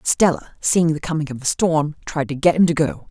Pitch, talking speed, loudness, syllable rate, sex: 155 Hz, 250 wpm, -19 LUFS, 5.3 syllables/s, female